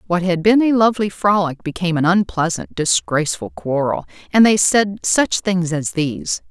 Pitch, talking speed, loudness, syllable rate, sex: 170 Hz, 165 wpm, -17 LUFS, 5.0 syllables/s, female